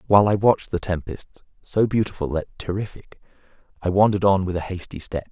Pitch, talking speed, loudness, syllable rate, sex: 95 Hz, 180 wpm, -22 LUFS, 6.0 syllables/s, male